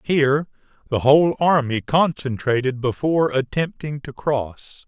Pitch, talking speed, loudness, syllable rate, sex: 140 Hz, 110 wpm, -20 LUFS, 4.4 syllables/s, male